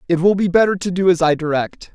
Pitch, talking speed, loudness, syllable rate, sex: 180 Hz, 275 wpm, -16 LUFS, 6.3 syllables/s, male